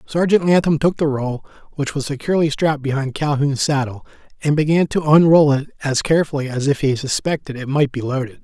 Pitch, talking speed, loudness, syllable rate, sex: 145 Hz, 190 wpm, -18 LUFS, 5.9 syllables/s, male